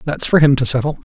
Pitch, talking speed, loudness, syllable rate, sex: 140 Hz, 270 wpm, -15 LUFS, 7.0 syllables/s, male